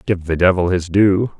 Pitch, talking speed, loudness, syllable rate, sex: 90 Hz, 215 wpm, -16 LUFS, 4.8 syllables/s, male